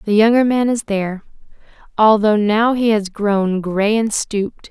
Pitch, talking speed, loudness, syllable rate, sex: 215 Hz, 165 wpm, -16 LUFS, 4.4 syllables/s, female